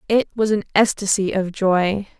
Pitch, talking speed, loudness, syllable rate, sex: 200 Hz, 165 wpm, -19 LUFS, 4.6 syllables/s, female